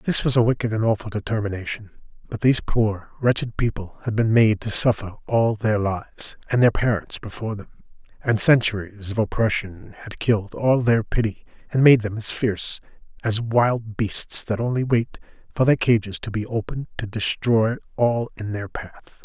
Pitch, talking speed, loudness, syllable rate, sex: 110 Hz, 180 wpm, -22 LUFS, 5.1 syllables/s, male